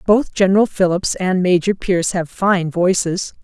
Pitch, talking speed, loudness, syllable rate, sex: 185 Hz, 155 wpm, -17 LUFS, 4.7 syllables/s, female